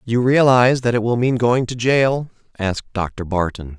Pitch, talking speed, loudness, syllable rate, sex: 115 Hz, 190 wpm, -18 LUFS, 4.8 syllables/s, male